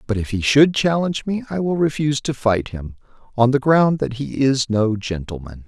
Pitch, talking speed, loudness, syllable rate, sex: 130 Hz, 210 wpm, -19 LUFS, 5.1 syllables/s, male